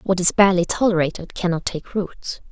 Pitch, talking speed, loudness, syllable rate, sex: 180 Hz, 165 wpm, -20 LUFS, 5.4 syllables/s, female